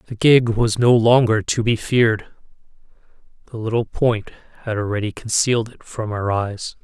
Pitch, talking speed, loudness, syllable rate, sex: 110 Hz, 160 wpm, -19 LUFS, 5.0 syllables/s, male